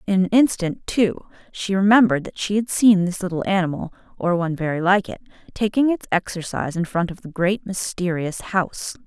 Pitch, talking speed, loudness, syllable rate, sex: 190 Hz, 185 wpm, -21 LUFS, 5.6 syllables/s, female